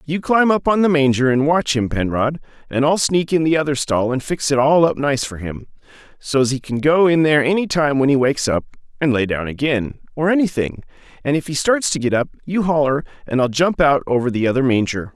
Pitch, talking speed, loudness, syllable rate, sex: 145 Hz, 240 wpm, -18 LUFS, 5.7 syllables/s, male